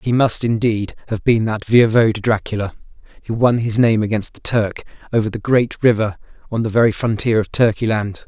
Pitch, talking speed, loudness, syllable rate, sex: 110 Hz, 190 wpm, -17 LUFS, 5.5 syllables/s, male